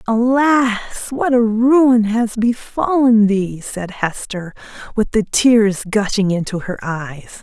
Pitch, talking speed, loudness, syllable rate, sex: 220 Hz, 130 wpm, -16 LUFS, 3.6 syllables/s, female